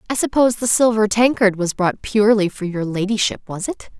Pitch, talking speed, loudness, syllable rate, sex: 215 Hz, 195 wpm, -18 LUFS, 5.6 syllables/s, female